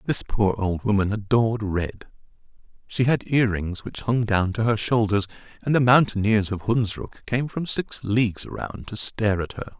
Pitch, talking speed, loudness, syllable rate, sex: 110 Hz, 180 wpm, -23 LUFS, 4.8 syllables/s, male